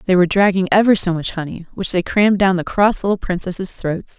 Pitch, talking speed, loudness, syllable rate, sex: 185 Hz, 230 wpm, -17 LUFS, 6.1 syllables/s, female